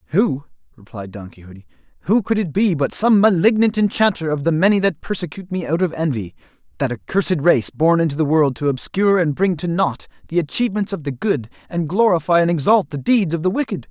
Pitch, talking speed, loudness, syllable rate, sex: 165 Hz, 205 wpm, -18 LUFS, 6.0 syllables/s, male